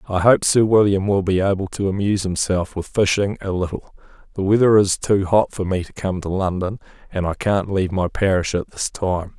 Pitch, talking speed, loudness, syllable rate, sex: 95 Hz, 215 wpm, -19 LUFS, 5.3 syllables/s, male